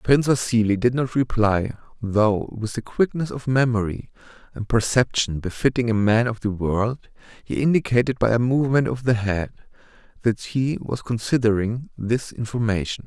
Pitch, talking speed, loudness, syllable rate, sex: 115 Hz, 150 wpm, -22 LUFS, 4.9 syllables/s, male